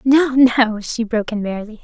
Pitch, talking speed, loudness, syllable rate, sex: 230 Hz, 195 wpm, -17 LUFS, 5.3 syllables/s, female